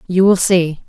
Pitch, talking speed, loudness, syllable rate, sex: 180 Hz, 205 wpm, -14 LUFS, 4.2 syllables/s, female